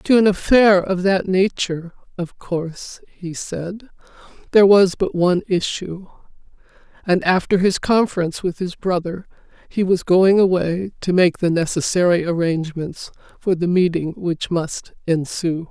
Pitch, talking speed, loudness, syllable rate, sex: 180 Hz, 140 wpm, -18 LUFS, 4.5 syllables/s, female